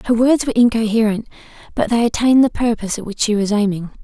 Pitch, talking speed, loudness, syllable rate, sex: 225 Hz, 210 wpm, -16 LUFS, 7.0 syllables/s, female